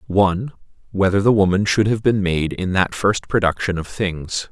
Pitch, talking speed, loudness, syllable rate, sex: 95 Hz, 185 wpm, -19 LUFS, 5.1 syllables/s, male